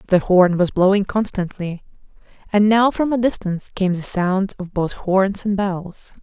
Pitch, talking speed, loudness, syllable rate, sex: 195 Hz, 175 wpm, -19 LUFS, 4.4 syllables/s, female